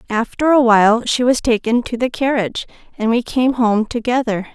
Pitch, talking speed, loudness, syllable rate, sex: 240 Hz, 170 wpm, -16 LUFS, 5.3 syllables/s, female